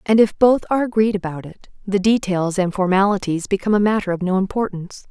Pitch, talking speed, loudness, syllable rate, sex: 195 Hz, 200 wpm, -18 LUFS, 6.3 syllables/s, female